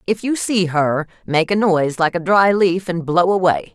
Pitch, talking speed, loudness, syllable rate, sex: 180 Hz, 225 wpm, -17 LUFS, 4.7 syllables/s, female